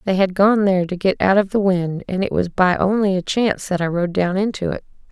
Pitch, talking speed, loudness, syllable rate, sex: 190 Hz, 270 wpm, -18 LUFS, 5.7 syllables/s, female